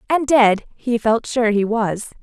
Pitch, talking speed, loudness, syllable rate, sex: 230 Hz, 190 wpm, -18 LUFS, 3.8 syllables/s, female